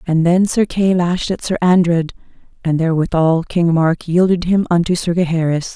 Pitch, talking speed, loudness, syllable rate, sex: 170 Hz, 175 wpm, -16 LUFS, 5.0 syllables/s, female